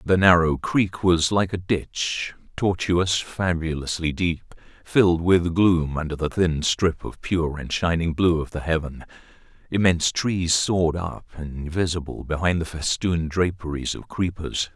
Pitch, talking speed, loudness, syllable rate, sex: 85 Hz, 145 wpm, -23 LUFS, 4.3 syllables/s, male